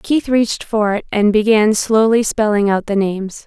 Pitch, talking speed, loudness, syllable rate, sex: 215 Hz, 190 wpm, -15 LUFS, 4.8 syllables/s, female